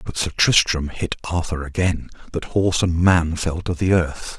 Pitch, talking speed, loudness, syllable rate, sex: 85 Hz, 190 wpm, -20 LUFS, 4.5 syllables/s, male